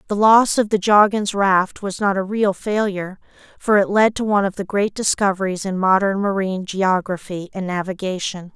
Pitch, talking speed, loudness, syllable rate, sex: 195 Hz, 180 wpm, -19 LUFS, 5.2 syllables/s, female